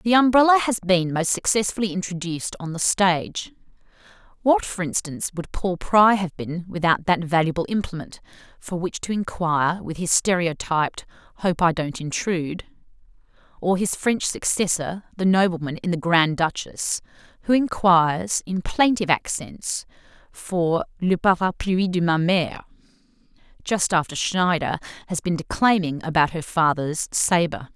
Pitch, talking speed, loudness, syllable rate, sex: 180 Hz, 140 wpm, -22 LUFS, 4.8 syllables/s, female